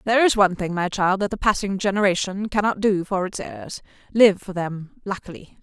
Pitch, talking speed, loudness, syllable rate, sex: 195 Hz, 180 wpm, -21 LUFS, 5.4 syllables/s, female